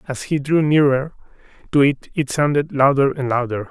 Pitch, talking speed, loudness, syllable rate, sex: 140 Hz, 180 wpm, -18 LUFS, 5.1 syllables/s, male